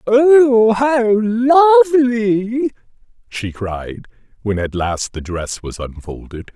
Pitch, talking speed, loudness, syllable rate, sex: 185 Hz, 110 wpm, -15 LUFS, 3.1 syllables/s, male